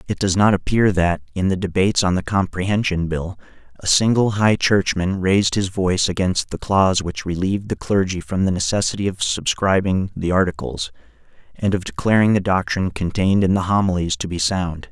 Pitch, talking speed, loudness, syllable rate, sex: 95 Hz, 180 wpm, -19 LUFS, 5.5 syllables/s, male